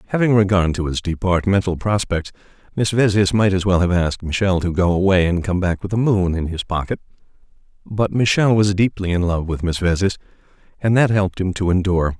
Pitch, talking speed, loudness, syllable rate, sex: 95 Hz, 200 wpm, -18 LUFS, 6.0 syllables/s, male